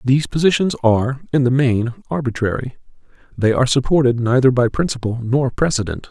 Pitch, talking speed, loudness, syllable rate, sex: 130 Hz, 145 wpm, -17 LUFS, 5.9 syllables/s, male